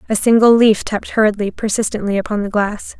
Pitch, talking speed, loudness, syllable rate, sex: 210 Hz, 180 wpm, -15 LUFS, 6.1 syllables/s, female